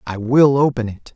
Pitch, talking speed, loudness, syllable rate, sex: 125 Hz, 210 wpm, -16 LUFS, 4.9 syllables/s, male